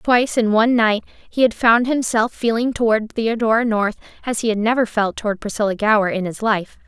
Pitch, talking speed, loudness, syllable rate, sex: 220 Hz, 200 wpm, -18 LUFS, 5.5 syllables/s, female